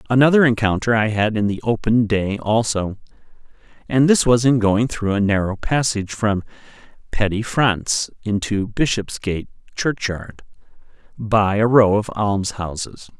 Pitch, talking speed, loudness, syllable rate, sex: 110 Hz, 135 wpm, -19 LUFS, 4.7 syllables/s, male